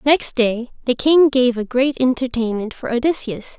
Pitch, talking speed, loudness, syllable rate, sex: 255 Hz, 165 wpm, -18 LUFS, 4.5 syllables/s, female